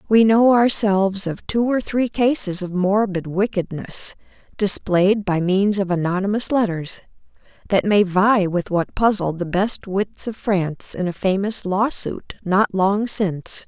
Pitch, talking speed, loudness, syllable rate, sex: 195 Hz, 160 wpm, -19 LUFS, 4.2 syllables/s, female